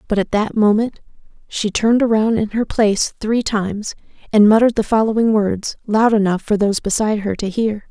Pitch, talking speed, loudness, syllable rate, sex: 215 Hz, 190 wpm, -17 LUFS, 5.5 syllables/s, female